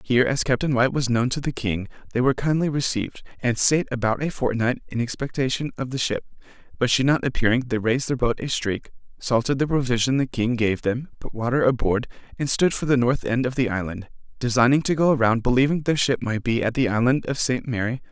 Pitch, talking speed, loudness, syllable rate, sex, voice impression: 125 Hz, 220 wpm, -22 LUFS, 5.9 syllables/s, male, masculine, adult-like, tensed, powerful, bright, slightly raspy, cool, intellectual, calm, friendly, wild, lively